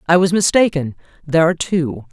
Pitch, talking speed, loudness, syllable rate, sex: 165 Hz, 170 wpm, -16 LUFS, 6.2 syllables/s, female